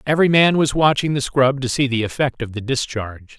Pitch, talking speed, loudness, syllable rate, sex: 130 Hz, 230 wpm, -18 LUFS, 5.8 syllables/s, male